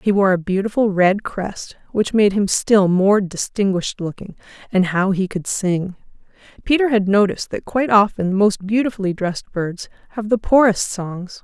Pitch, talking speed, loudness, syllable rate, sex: 200 Hz, 175 wpm, -18 LUFS, 5.0 syllables/s, female